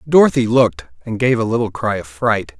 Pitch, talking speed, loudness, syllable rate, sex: 115 Hz, 210 wpm, -16 LUFS, 5.5 syllables/s, male